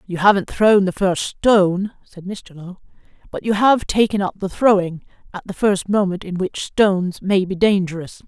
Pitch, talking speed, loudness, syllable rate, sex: 195 Hz, 190 wpm, -18 LUFS, 4.7 syllables/s, female